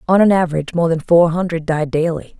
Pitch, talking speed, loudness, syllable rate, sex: 165 Hz, 225 wpm, -16 LUFS, 6.3 syllables/s, female